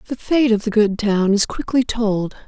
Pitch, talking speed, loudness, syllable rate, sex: 220 Hz, 220 wpm, -18 LUFS, 4.6 syllables/s, female